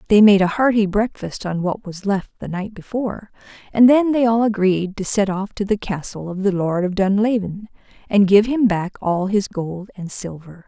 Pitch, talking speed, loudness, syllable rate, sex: 200 Hz, 210 wpm, -19 LUFS, 4.9 syllables/s, female